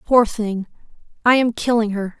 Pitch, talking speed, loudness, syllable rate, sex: 220 Hz, 165 wpm, -19 LUFS, 4.6 syllables/s, female